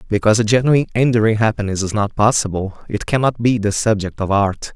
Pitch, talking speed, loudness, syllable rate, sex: 110 Hz, 190 wpm, -17 LUFS, 6.1 syllables/s, male